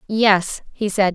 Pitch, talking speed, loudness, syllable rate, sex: 200 Hz, 155 wpm, -18 LUFS, 3.2 syllables/s, female